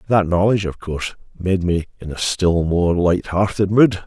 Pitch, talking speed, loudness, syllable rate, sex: 90 Hz, 175 wpm, -19 LUFS, 4.8 syllables/s, male